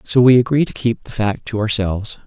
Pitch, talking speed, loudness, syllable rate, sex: 115 Hz, 240 wpm, -17 LUFS, 5.7 syllables/s, male